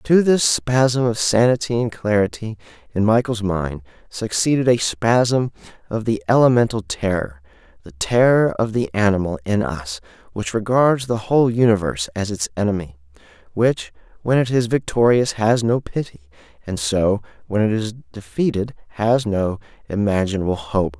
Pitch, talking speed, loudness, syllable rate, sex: 105 Hz, 145 wpm, -19 LUFS, 4.7 syllables/s, male